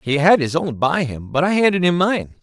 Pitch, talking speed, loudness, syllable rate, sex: 160 Hz, 270 wpm, -17 LUFS, 5.3 syllables/s, male